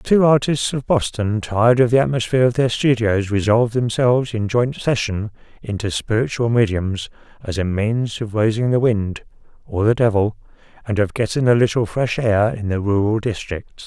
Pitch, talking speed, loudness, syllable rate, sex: 115 Hz, 165 wpm, -19 LUFS, 5.0 syllables/s, male